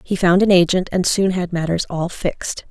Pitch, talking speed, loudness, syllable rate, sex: 180 Hz, 220 wpm, -18 LUFS, 5.1 syllables/s, female